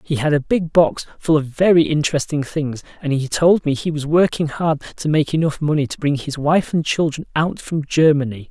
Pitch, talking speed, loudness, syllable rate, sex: 150 Hz, 220 wpm, -18 LUFS, 5.1 syllables/s, male